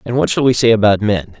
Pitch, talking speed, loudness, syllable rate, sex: 110 Hz, 300 wpm, -14 LUFS, 6.2 syllables/s, male